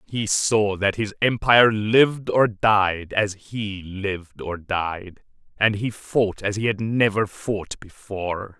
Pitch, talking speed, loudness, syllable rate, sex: 105 Hz, 155 wpm, -22 LUFS, 3.6 syllables/s, male